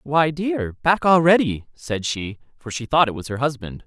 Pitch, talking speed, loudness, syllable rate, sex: 135 Hz, 200 wpm, -20 LUFS, 4.6 syllables/s, male